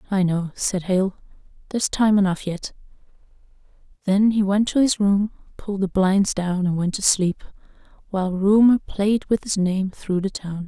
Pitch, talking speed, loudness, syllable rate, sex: 195 Hz, 175 wpm, -21 LUFS, 4.7 syllables/s, female